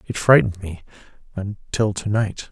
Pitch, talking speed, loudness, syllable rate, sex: 100 Hz, 120 wpm, -20 LUFS, 4.9 syllables/s, male